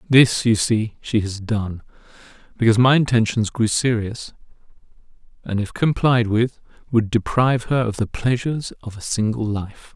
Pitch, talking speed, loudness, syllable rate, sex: 115 Hz, 150 wpm, -20 LUFS, 4.8 syllables/s, male